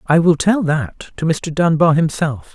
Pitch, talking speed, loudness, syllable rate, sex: 160 Hz, 190 wpm, -16 LUFS, 4.2 syllables/s, male